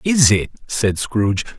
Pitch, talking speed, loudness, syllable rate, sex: 120 Hz, 150 wpm, -18 LUFS, 4.1 syllables/s, male